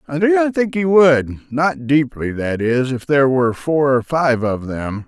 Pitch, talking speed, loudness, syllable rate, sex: 135 Hz, 190 wpm, -17 LUFS, 4.4 syllables/s, male